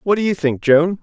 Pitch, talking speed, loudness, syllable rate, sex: 170 Hz, 290 wpm, -16 LUFS, 5.4 syllables/s, male